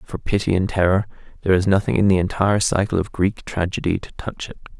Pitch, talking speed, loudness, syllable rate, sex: 95 Hz, 215 wpm, -20 LUFS, 6.3 syllables/s, male